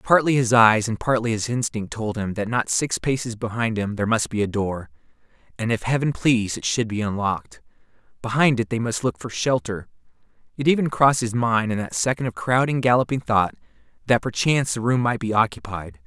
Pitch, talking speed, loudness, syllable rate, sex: 115 Hz, 200 wpm, -22 LUFS, 5.6 syllables/s, male